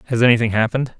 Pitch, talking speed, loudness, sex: 120 Hz, 240 wpm, -17 LUFS, male